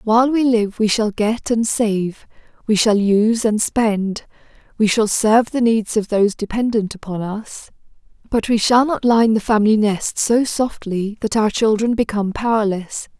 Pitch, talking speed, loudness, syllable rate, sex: 220 Hz, 175 wpm, -17 LUFS, 4.7 syllables/s, female